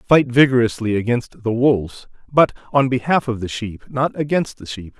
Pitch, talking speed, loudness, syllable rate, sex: 120 Hz, 180 wpm, -18 LUFS, 4.9 syllables/s, male